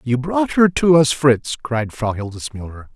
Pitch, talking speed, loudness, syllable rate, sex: 135 Hz, 180 wpm, -17 LUFS, 4.3 syllables/s, male